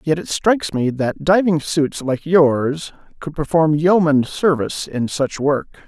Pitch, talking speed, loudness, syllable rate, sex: 155 Hz, 165 wpm, -18 LUFS, 4.1 syllables/s, male